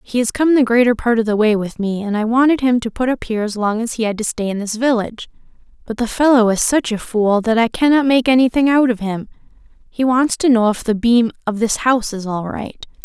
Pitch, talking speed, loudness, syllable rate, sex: 230 Hz, 260 wpm, -16 LUFS, 5.9 syllables/s, female